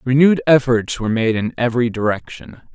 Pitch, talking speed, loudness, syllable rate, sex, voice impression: 125 Hz, 155 wpm, -17 LUFS, 6.1 syllables/s, male, very masculine, very adult-like, very middle-aged, very thick, tensed, slightly powerful, dark, soft, clear, fluent, cool, intellectual, slightly refreshing, sincere, very calm, very mature, very friendly, reassuring, unique, slightly elegant, wild, sweet, kind